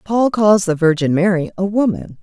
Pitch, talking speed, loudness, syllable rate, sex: 190 Hz, 190 wpm, -16 LUFS, 4.8 syllables/s, female